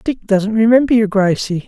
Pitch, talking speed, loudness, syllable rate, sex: 215 Hz, 180 wpm, -14 LUFS, 5.1 syllables/s, female